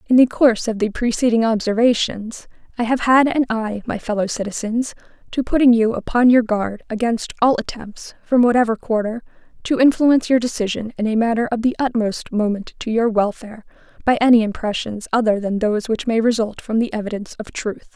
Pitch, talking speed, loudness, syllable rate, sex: 225 Hz, 185 wpm, -18 LUFS, 5.6 syllables/s, female